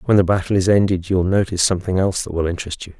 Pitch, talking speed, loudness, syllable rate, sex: 95 Hz, 280 wpm, -18 LUFS, 8.1 syllables/s, male